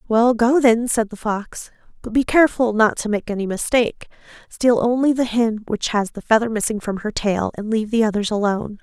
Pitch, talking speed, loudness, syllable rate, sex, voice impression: 225 Hz, 210 wpm, -19 LUFS, 5.5 syllables/s, female, feminine, adult-like, tensed, bright, slightly soft, slightly muffled, fluent, slightly cute, calm, friendly, elegant, kind